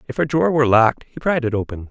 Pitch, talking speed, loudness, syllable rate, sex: 130 Hz, 285 wpm, -18 LUFS, 7.9 syllables/s, male